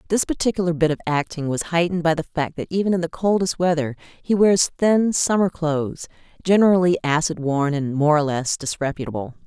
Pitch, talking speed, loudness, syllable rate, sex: 165 Hz, 185 wpm, -20 LUFS, 5.7 syllables/s, female